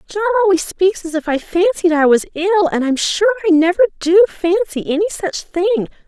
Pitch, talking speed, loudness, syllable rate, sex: 345 Hz, 205 wpm, -15 LUFS, 5.8 syllables/s, female